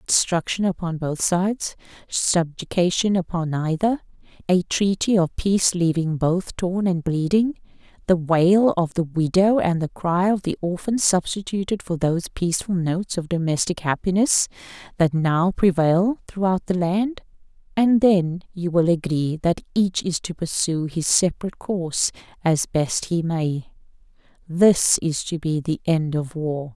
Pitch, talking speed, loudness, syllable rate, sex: 175 Hz, 150 wpm, -21 LUFS, 4.4 syllables/s, female